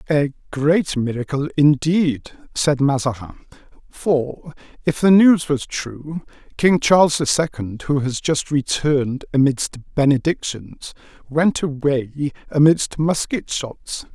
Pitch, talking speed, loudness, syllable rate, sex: 145 Hz, 115 wpm, -19 LUFS, 3.8 syllables/s, male